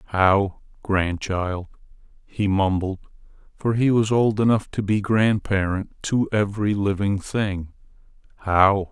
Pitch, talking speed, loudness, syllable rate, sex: 100 Hz, 115 wpm, -22 LUFS, 3.9 syllables/s, male